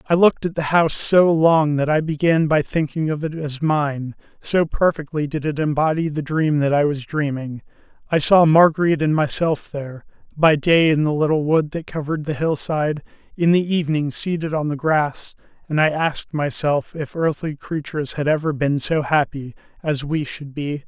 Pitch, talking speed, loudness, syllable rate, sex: 150 Hz, 190 wpm, -19 LUFS, 5.1 syllables/s, male